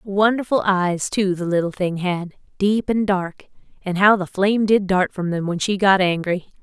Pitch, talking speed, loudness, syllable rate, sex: 190 Hz, 180 wpm, -19 LUFS, 4.6 syllables/s, female